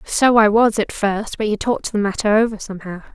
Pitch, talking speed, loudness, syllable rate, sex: 210 Hz, 230 wpm, -17 LUFS, 5.8 syllables/s, female